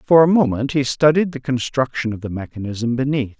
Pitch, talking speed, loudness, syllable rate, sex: 130 Hz, 195 wpm, -19 LUFS, 5.5 syllables/s, male